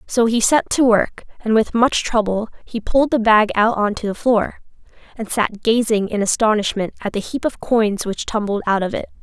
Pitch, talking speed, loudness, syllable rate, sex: 220 Hz, 215 wpm, -18 LUFS, 5.1 syllables/s, female